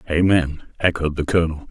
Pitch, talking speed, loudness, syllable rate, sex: 80 Hz, 140 wpm, -20 LUFS, 5.7 syllables/s, male